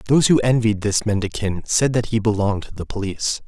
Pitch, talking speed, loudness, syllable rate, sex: 110 Hz, 205 wpm, -20 LUFS, 5.9 syllables/s, male